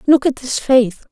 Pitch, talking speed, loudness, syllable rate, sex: 260 Hz, 215 wpm, -15 LUFS, 4.8 syllables/s, female